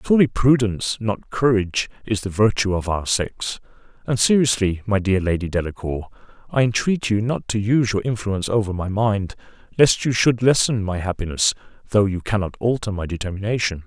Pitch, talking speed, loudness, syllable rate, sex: 105 Hz, 170 wpm, -20 LUFS, 5.5 syllables/s, male